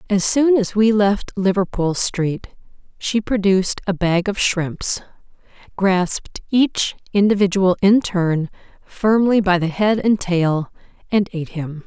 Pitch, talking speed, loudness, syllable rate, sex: 195 Hz, 135 wpm, -18 LUFS, 3.9 syllables/s, female